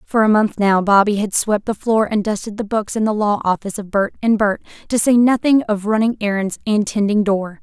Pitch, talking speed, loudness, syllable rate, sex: 210 Hz, 235 wpm, -17 LUFS, 5.4 syllables/s, female